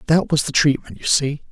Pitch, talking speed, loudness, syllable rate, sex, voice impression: 150 Hz, 240 wpm, -18 LUFS, 5.5 syllables/s, male, masculine, middle-aged, slightly relaxed, powerful, soft, raspy, intellectual, sincere, calm, slightly mature, friendly, reassuring, slightly wild, lively, slightly modest